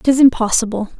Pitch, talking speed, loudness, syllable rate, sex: 235 Hz, 180 wpm, -15 LUFS, 6.6 syllables/s, female